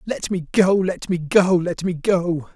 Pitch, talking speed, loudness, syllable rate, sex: 180 Hz, 210 wpm, -20 LUFS, 3.7 syllables/s, male